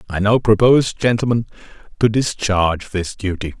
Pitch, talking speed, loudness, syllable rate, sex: 105 Hz, 135 wpm, -17 LUFS, 5.2 syllables/s, male